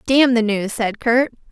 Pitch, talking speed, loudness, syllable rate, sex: 235 Hz, 195 wpm, -18 LUFS, 4.2 syllables/s, female